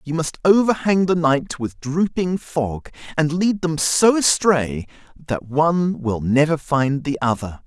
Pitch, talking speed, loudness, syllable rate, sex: 155 Hz, 155 wpm, -19 LUFS, 3.9 syllables/s, male